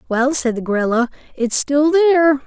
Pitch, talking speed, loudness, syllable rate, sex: 275 Hz, 170 wpm, -16 LUFS, 5.1 syllables/s, female